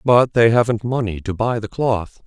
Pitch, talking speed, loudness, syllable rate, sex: 110 Hz, 210 wpm, -18 LUFS, 4.9 syllables/s, male